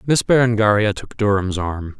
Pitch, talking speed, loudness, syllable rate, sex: 105 Hz, 150 wpm, -18 LUFS, 4.9 syllables/s, male